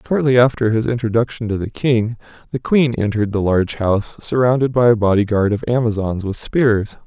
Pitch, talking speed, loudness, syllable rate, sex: 115 Hz, 185 wpm, -17 LUFS, 5.6 syllables/s, male